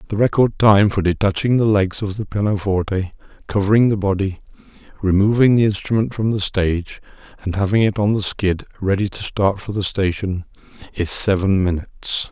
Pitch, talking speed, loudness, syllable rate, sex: 100 Hz, 165 wpm, -18 LUFS, 5.3 syllables/s, male